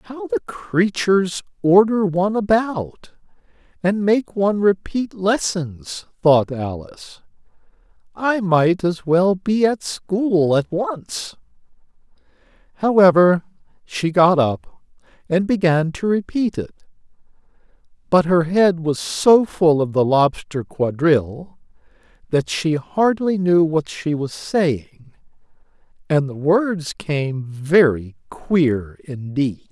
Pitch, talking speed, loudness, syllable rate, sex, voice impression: 170 Hz, 115 wpm, -18 LUFS, 3.4 syllables/s, male, masculine, middle-aged, tensed, powerful, bright, halting, slightly raspy, friendly, unique, lively, intense